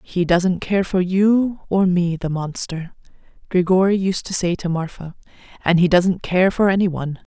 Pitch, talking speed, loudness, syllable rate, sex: 180 Hz, 180 wpm, -19 LUFS, 4.6 syllables/s, female